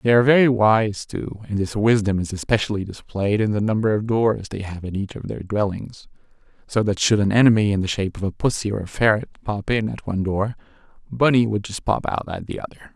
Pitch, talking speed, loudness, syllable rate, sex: 105 Hz, 230 wpm, -21 LUFS, 6.0 syllables/s, male